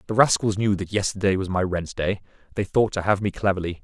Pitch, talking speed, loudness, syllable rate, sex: 100 Hz, 235 wpm, -23 LUFS, 6.1 syllables/s, male